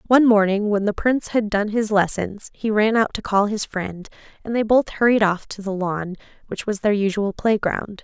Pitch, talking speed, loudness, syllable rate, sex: 210 Hz, 215 wpm, -20 LUFS, 5.1 syllables/s, female